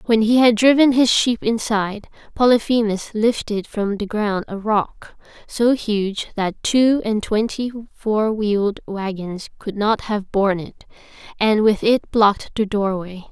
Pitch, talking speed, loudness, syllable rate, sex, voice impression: 215 Hz, 155 wpm, -19 LUFS, 4.2 syllables/s, female, feminine, slightly adult-like, slightly powerful, slightly cute, slightly intellectual, slightly calm